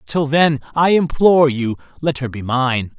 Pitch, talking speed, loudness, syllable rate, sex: 140 Hz, 180 wpm, -16 LUFS, 4.4 syllables/s, male